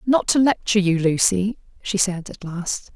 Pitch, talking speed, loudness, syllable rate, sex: 195 Hz, 185 wpm, -20 LUFS, 4.6 syllables/s, female